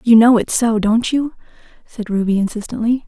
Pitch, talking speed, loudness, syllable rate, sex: 225 Hz, 175 wpm, -16 LUFS, 5.3 syllables/s, female